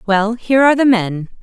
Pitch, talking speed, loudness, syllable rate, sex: 220 Hz, 210 wpm, -14 LUFS, 5.9 syllables/s, female